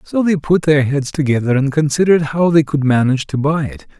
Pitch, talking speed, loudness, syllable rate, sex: 145 Hz, 225 wpm, -15 LUFS, 5.8 syllables/s, male